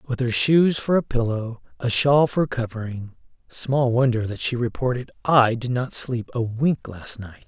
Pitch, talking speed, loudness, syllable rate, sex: 120 Hz, 185 wpm, -22 LUFS, 4.4 syllables/s, male